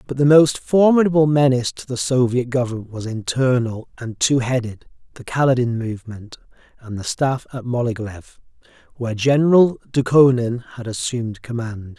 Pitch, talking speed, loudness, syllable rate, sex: 125 Hz, 135 wpm, -19 LUFS, 5.2 syllables/s, male